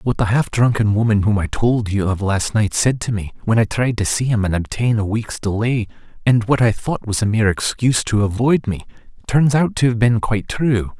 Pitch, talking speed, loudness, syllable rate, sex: 110 Hz, 240 wpm, -18 LUFS, 5.3 syllables/s, male